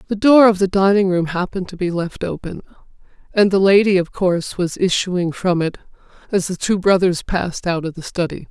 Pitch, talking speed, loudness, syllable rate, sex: 185 Hz, 205 wpm, -17 LUFS, 5.6 syllables/s, female